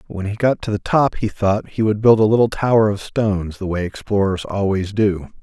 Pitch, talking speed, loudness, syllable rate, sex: 105 Hz, 230 wpm, -18 LUFS, 5.2 syllables/s, male